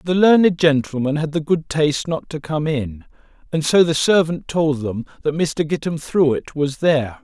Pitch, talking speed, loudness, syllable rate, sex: 155 Hz, 185 wpm, -19 LUFS, 4.7 syllables/s, male